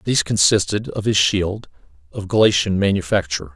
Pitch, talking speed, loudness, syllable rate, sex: 95 Hz, 135 wpm, -18 LUFS, 5.7 syllables/s, male